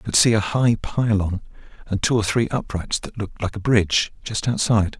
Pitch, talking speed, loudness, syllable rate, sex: 105 Hz, 215 wpm, -21 LUFS, 5.4 syllables/s, male